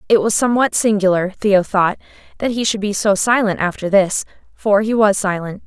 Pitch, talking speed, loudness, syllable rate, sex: 205 Hz, 190 wpm, -16 LUFS, 5.3 syllables/s, female